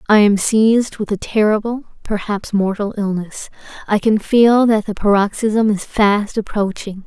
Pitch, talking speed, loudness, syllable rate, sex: 210 Hz, 155 wpm, -16 LUFS, 4.4 syllables/s, female